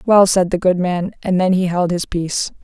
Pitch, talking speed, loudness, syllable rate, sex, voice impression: 180 Hz, 250 wpm, -17 LUFS, 5.1 syllables/s, female, feminine, adult-like, slightly relaxed, slightly weak, slightly dark, soft, fluent, raspy, calm, friendly, reassuring, elegant, slightly lively, kind, modest